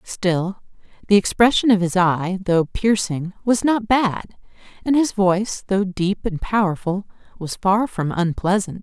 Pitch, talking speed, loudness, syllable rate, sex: 195 Hz, 150 wpm, -20 LUFS, 4.2 syllables/s, female